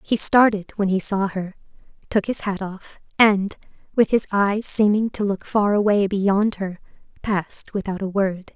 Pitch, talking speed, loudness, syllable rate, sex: 200 Hz, 175 wpm, -21 LUFS, 4.4 syllables/s, female